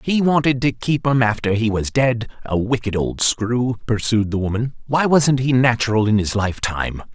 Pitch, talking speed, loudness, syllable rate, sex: 115 Hz, 200 wpm, -19 LUFS, 5.1 syllables/s, male